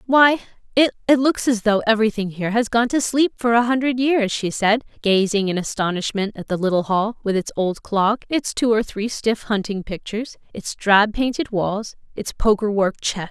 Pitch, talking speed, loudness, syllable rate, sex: 220 Hz, 195 wpm, -20 LUFS, 5.0 syllables/s, female